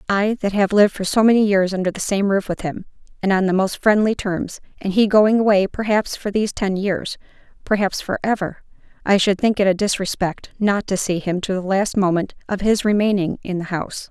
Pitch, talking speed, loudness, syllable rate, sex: 200 Hz, 220 wpm, -19 LUFS, 5.5 syllables/s, female